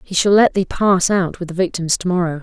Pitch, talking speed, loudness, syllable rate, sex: 180 Hz, 270 wpm, -16 LUFS, 5.6 syllables/s, female